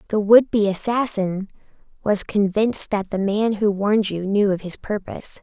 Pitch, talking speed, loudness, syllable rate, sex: 205 Hz, 175 wpm, -20 LUFS, 5.0 syllables/s, female